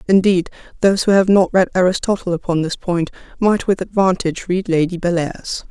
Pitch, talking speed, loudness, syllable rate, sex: 180 Hz, 170 wpm, -17 LUFS, 5.5 syllables/s, female